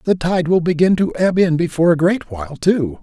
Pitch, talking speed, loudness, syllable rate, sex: 165 Hz, 240 wpm, -16 LUFS, 5.6 syllables/s, male